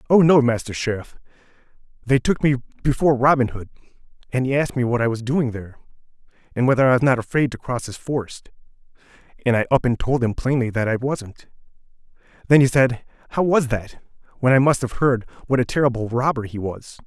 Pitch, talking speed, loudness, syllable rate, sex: 125 Hz, 195 wpm, -20 LUFS, 6.1 syllables/s, male